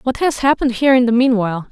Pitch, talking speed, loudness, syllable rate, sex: 245 Hz, 245 wpm, -15 LUFS, 7.6 syllables/s, female